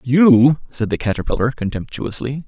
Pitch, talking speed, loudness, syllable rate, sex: 130 Hz, 120 wpm, -17 LUFS, 4.9 syllables/s, male